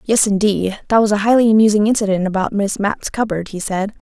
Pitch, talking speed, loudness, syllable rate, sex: 205 Hz, 205 wpm, -16 LUFS, 5.8 syllables/s, female